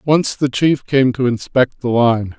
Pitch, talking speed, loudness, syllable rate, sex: 130 Hz, 200 wpm, -16 LUFS, 3.9 syllables/s, male